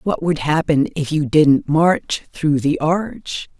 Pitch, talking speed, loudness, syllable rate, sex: 155 Hz, 165 wpm, -18 LUFS, 3.4 syllables/s, female